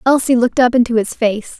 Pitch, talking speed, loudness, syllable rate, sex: 240 Hz, 225 wpm, -14 LUFS, 6.1 syllables/s, female